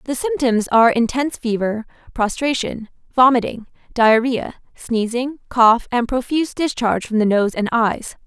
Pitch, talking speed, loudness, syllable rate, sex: 240 Hz, 130 wpm, -18 LUFS, 4.8 syllables/s, female